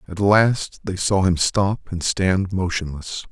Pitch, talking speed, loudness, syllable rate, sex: 95 Hz, 165 wpm, -20 LUFS, 3.7 syllables/s, male